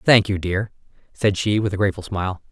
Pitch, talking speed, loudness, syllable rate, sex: 100 Hz, 215 wpm, -21 LUFS, 6.2 syllables/s, male